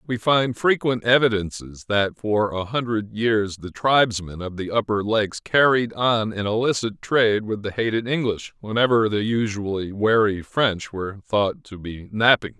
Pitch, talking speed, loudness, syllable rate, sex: 110 Hz, 160 wpm, -21 LUFS, 4.6 syllables/s, male